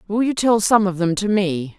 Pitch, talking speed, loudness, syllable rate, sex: 200 Hz, 270 wpm, -18 LUFS, 4.9 syllables/s, female